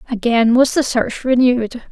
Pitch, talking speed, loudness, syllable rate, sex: 240 Hz, 155 wpm, -15 LUFS, 5.0 syllables/s, female